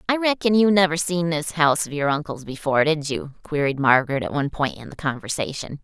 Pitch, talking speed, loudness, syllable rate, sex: 155 Hz, 215 wpm, -22 LUFS, 6.1 syllables/s, female